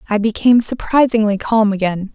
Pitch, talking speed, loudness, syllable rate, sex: 215 Hz, 140 wpm, -15 LUFS, 5.6 syllables/s, female